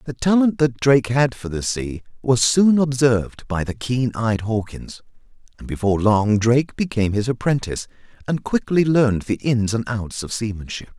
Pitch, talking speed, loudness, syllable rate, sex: 120 Hz, 175 wpm, -20 LUFS, 5.1 syllables/s, male